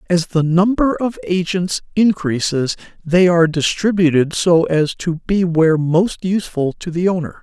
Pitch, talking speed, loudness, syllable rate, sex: 170 Hz, 155 wpm, -16 LUFS, 4.6 syllables/s, male